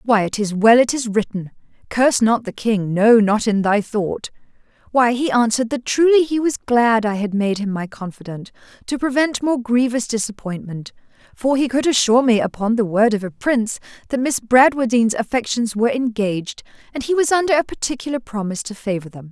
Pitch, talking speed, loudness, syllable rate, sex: 230 Hz, 185 wpm, -18 LUFS, 5.5 syllables/s, female